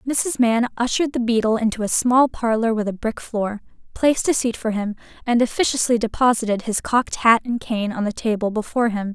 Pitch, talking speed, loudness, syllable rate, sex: 230 Hz, 205 wpm, -20 LUFS, 5.7 syllables/s, female